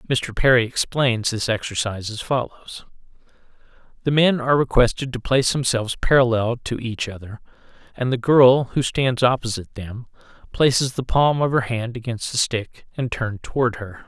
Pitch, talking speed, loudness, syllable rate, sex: 120 Hz, 160 wpm, -20 LUFS, 5.2 syllables/s, male